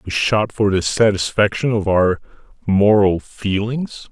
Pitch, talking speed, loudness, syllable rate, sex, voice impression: 105 Hz, 145 wpm, -17 LUFS, 4.2 syllables/s, male, very masculine, middle-aged, slightly muffled, sincere, slightly mature, kind